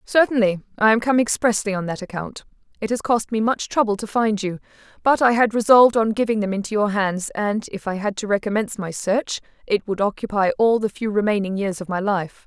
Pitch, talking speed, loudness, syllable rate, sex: 210 Hz, 220 wpm, -20 LUFS, 5.7 syllables/s, female